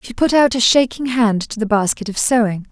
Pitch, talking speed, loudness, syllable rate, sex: 230 Hz, 245 wpm, -16 LUFS, 5.4 syllables/s, female